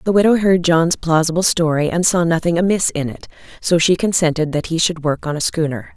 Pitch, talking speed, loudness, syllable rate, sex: 165 Hz, 220 wpm, -17 LUFS, 5.7 syllables/s, female